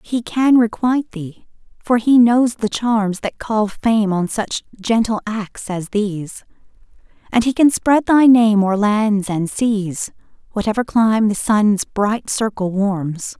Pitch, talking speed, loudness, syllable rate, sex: 215 Hz, 155 wpm, -17 LUFS, 3.9 syllables/s, female